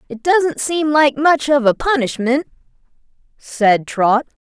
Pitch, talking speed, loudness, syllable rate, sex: 275 Hz, 135 wpm, -16 LUFS, 3.8 syllables/s, female